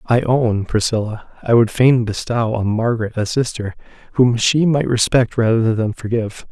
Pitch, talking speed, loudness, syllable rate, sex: 115 Hz, 165 wpm, -17 LUFS, 4.8 syllables/s, male